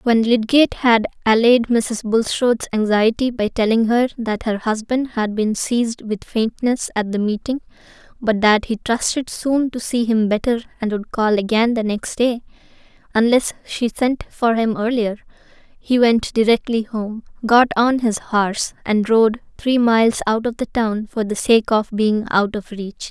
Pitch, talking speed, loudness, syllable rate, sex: 225 Hz, 175 wpm, -18 LUFS, 4.4 syllables/s, female